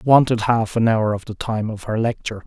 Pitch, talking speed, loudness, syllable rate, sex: 110 Hz, 270 wpm, -20 LUFS, 5.8 syllables/s, male